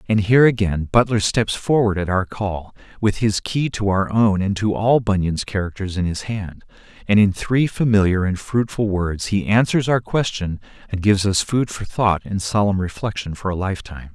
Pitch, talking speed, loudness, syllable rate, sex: 100 Hz, 195 wpm, -19 LUFS, 5.0 syllables/s, male